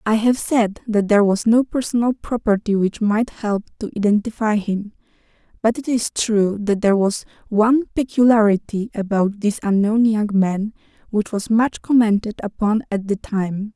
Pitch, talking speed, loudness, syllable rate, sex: 215 Hz, 160 wpm, -19 LUFS, 4.7 syllables/s, female